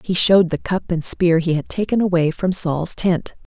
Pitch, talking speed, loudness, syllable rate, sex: 175 Hz, 220 wpm, -18 LUFS, 4.9 syllables/s, female